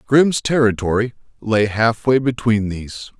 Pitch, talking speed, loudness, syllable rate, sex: 115 Hz, 115 wpm, -18 LUFS, 4.4 syllables/s, male